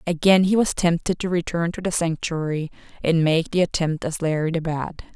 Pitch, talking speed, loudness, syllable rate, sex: 165 Hz, 200 wpm, -22 LUFS, 5.2 syllables/s, female